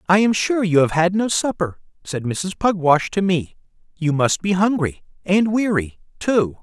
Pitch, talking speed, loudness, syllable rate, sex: 180 Hz, 180 wpm, -19 LUFS, 4.4 syllables/s, male